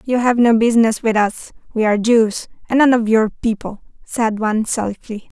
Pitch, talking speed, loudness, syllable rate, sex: 225 Hz, 190 wpm, -16 LUFS, 5.2 syllables/s, female